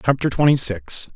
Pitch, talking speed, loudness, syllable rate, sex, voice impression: 125 Hz, 155 wpm, -18 LUFS, 4.9 syllables/s, male, masculine, very adult-like, slightly muffled, sincere, slightly friendly, slightly unique